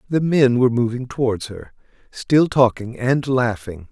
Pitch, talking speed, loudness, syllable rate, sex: 125 Hz, 155 wpm, -18 LUFS, 4.5 syllables/s, male